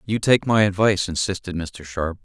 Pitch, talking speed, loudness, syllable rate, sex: 95 Hz, 190 wpm, -21 LUFS, 5.4 syllables/s, male